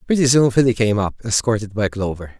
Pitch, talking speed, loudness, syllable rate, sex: 110 Hz, 200 wpm, -18 LUFS, 6.0 syllables/s, male